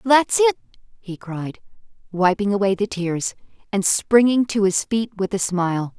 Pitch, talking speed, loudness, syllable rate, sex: 205 Hz, 160 wpm, -20 LUFS, 4.4 syllables/s, female